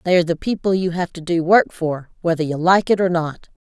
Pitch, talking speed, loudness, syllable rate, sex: 175 Hz, 260 wpm, -19 LUFS, 5.8 syllables/s, female